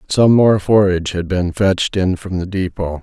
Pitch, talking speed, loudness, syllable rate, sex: 95 Hz, 200 wpm, -16 LUFS, 4.9 syllables/s, male